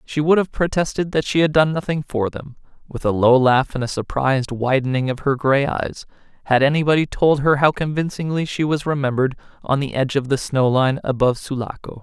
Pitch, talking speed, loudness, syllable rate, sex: 140 Hz, 205 wpm, -19 LUFS, 5.7 syllables/s, male